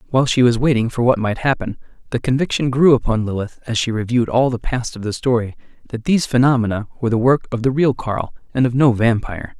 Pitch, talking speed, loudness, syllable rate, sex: 120 Hz, 225 wpm, -18 LUFS, 6.5 syllables/s, male